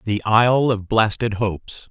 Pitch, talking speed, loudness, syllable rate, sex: 110 Hz, 155 wpm, -19 LUFS, 4.5 syllables/s, male